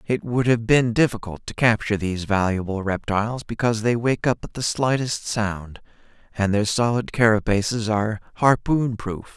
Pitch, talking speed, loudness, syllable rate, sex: 110 Hz, 160 wpm, -22 LUFS, 5.1 syllables/s, male